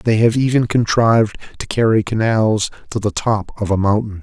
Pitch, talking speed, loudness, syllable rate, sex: 110 Hz, 185 wpm, -17 LUFS, 5.1 syllables/s, male